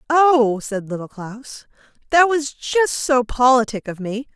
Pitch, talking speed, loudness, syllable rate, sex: 255 Hz, 150 wpm, -18 LUFS, 3.9 syllables/s, female